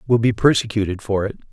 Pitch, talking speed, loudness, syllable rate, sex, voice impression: 110 Hz, 195 wpm, -19 LUFS, 6.4 syllables/s, male, masculine, adult-like, tensed, powerful, bright, slightly soft, clear, cool, intellectual, calm, friendly, reassuring, wild, lively